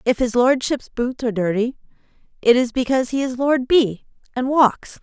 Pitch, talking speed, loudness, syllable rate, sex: 250 Hz, 180 wpm, -19 LUFS, 5.0 syllables/s, female